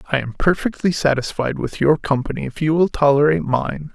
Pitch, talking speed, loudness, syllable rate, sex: 150 Hz, 185 wpm, -19 LUFS, 5.7 syllables/s, male